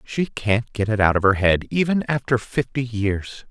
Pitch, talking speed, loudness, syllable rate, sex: 115 Hz, 205 wpm, -21 LUFS, 4.5 syllables/s, male